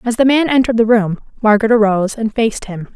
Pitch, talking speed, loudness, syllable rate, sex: 225 Hz, 225 wpm, -14 LUFS, 6.9 syllables/s, female